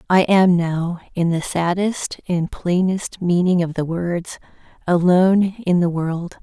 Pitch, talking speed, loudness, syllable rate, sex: 175 Hz, 150 wpm, -19 LUFS, 3.9 syllables/s, female